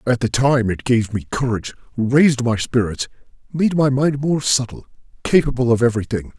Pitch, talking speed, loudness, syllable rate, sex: 125 Hz, 170 wpm, -18 LUFS, 5.5 syllables/s, male